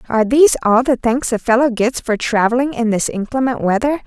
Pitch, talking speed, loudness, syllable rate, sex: 240 Hz, 205 wpm, -16 LUFS, 5.9 syllables/s, female